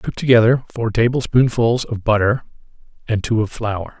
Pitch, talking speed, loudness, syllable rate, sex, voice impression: 115 Hz, 150 wpm, -17 LUFS, 5.0 syllables/s, male, masculine, very adult-like, slightly mature, slightly sweet